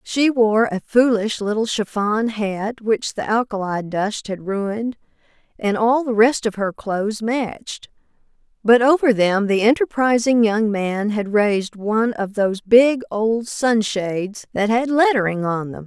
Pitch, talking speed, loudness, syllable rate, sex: 220 Hz, 155 wpm, -19 LUFS, 4.2 syllables/s, female